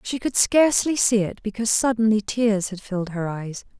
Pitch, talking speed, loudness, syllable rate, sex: 215 Hz, 190 wpm, -21 LUFS, 5.3 syllables/s, female